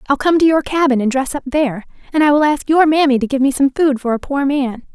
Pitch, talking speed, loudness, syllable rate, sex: 280 Hz, 290 wpm, -15 LUFS, 6.2 syllables/s, female